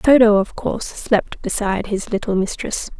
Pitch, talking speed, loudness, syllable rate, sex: 210 Hz, 160 wpm, -19 LUFS, 4.8 syllables/s, female